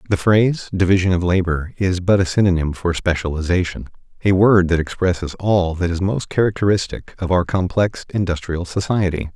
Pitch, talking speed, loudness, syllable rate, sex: 90 Hz, 160 wpm, -18 LUFS, 5.4 syllables/s, male